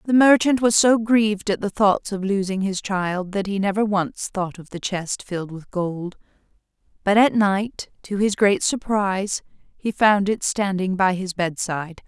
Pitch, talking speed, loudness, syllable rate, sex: 200 Hz, 185 wpm, -21 LUFS, 4.4 syllables/s, female